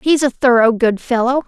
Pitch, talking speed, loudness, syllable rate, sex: 250 Hz, 205 wpm, -14 LUFS, 4.9 syllables/s, female